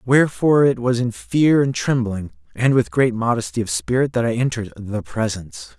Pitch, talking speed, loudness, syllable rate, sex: 120 Hz, 185 wpm, -19 LUFS, 5.4 syllables/s, male